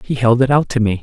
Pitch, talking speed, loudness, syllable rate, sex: 125 Hz, 350 wpm, -15 LUFS, 6.5 syllables/s, male